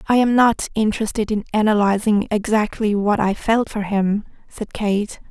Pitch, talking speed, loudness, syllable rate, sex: 210 Hz, 160 wpm, -19 LUFS, 4.7 syllables/s, female